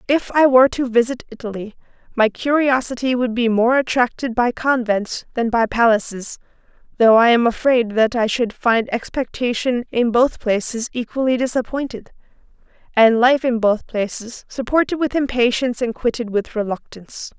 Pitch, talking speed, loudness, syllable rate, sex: 240 Hz, 150 wpm, -18 LUFS, 5.0 syllables/s, female